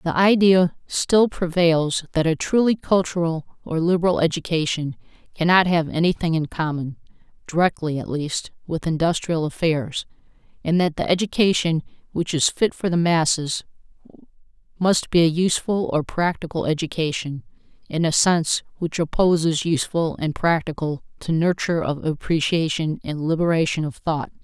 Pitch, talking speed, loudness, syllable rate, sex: 165 Hz, 135 wpm, -21 LUFS, 5.0 syllables/s, female